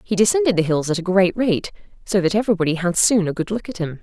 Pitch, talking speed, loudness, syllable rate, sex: 190 Hz, 285 wpm, -19 LUFS, 6.7 syllables/s, female